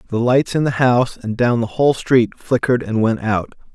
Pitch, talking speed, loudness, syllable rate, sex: 120 Hz, 225 wpm, -17 LUFS, 5.3 syllables/s, male